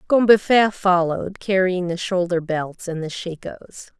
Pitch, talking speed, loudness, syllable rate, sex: 185 Hz, 135 wpm, -20 LUFS, 4.6 syllables/s, female